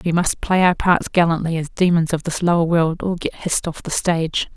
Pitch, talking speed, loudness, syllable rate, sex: 170 Hz, 235 wpm, -19 LUFS, 5.5 syllables/s, female